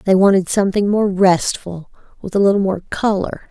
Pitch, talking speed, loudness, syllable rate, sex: 195 Hz, 170 wpm, -16 LUFS, 5.3 syllables/s, female